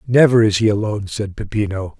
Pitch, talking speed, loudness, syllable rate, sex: 105 Hz, 180 wpm, -17 LUFS, 6.0 syllables/s, male